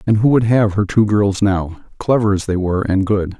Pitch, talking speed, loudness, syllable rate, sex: 100 Hz, 245 wpm, -16 LUFS, 5.1 syllables/s, male